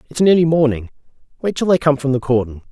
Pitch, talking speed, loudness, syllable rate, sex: 140 Hz, 220 wpm, -16 LUFS, 6.6 syllables/s, male